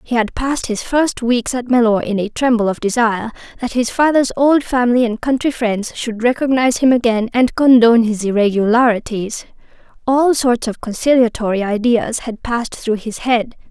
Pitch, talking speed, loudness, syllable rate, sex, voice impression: 235 Hz, 170 wpm, -16 LUFS, 5.2 syllables/s, female, gender-neutral, slightly young, tensed, powerful, bright, soft, clear, slightly halting, friendly, lively, kind, modest